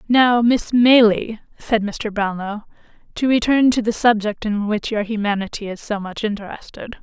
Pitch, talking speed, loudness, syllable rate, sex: 220 Hz, 160 wpm, -18 LUFS, 4.7 syllables/s, female